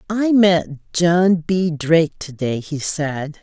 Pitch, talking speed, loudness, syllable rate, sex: 165 Hz, 160 wpm, -18 LUFS, 3.4 syllables/s, female